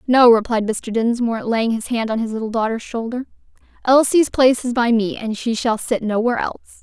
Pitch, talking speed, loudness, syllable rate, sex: 235 Hz, 200 wpm, -18 LUFS, 5.7 syllables/s, female